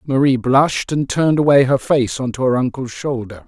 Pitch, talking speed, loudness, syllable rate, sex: 130 Hz, 205 wpm, -17 LUFS, 5.3 syllables/s, male